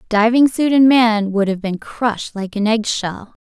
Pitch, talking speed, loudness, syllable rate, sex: 220 Hz, 210 wpm, -16 LUFS, 4.4 syllables/s, female